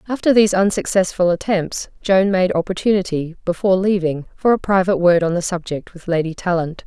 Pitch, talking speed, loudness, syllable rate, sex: 185 Hz, 165 wpm, -18 LUFS, 5.8 syllables/s, female